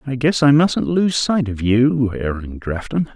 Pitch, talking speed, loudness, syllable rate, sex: 130 Hz, 190 wpm, -18 LUFS, 4.0 syllables/s, male